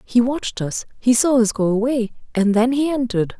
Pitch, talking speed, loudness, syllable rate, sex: 235 Hz, 210 wpm, -19 LUFS, 5.4 syllables/s, female